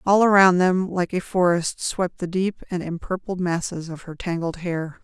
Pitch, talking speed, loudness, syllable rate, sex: 180 Hz, 190 wpm, -22 LUFS, 4.5 syllables/s, female